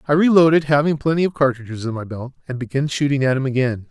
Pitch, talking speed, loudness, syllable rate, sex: 140 Hz, 230 wpm, -18 LUFS, 6.7 syllables/s, male